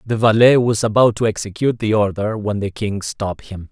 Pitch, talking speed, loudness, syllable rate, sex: 105 Hz, 210 wpm, -17 LUFS, 5.5 syllables/s, male